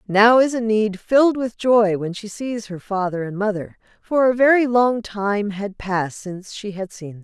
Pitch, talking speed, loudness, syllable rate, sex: 210 Hz, 205 wpm, -19 LUFS, 4.8 syllables/s, female